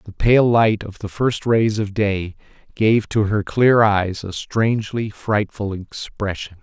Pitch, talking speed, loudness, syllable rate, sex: 105 Hz, 165 wpm, -19 LUFS, 3.8 syllables/s, male